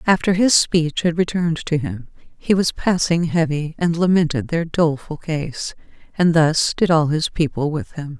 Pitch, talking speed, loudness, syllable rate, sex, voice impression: 160 Hz, 175 wpm, -19 LUFS, 4.6 syllables/s, female, feminine, middle-aged, slightly thick, tensed, slightly powerful, slightly hard, clear, fluent, intellectual, calm, elegant, slightly lively, strict, sharp